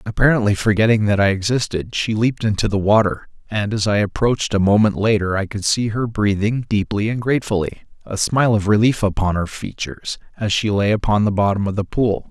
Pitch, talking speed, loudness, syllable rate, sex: 105 Hz, 200 wpm, -18 LUFS, 5.8 syllables/s, male